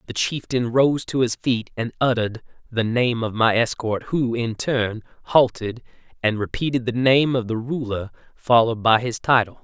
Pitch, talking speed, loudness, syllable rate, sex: 120 Hz, 175 wpm, -21 LUFS, 4.9 syllables/s, male